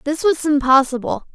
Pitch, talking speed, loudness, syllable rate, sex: 285 Hz, 135 wpm, -17 LUFS, 5.0 syllables/s, female